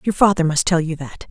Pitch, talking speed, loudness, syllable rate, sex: 170 Hz, 275 wpm, -18 LUFS, 5.9 syllables/s, female